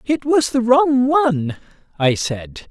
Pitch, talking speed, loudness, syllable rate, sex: 220 Hz, 155 wpm, -17 LUFS, 3.6 syllables/s, male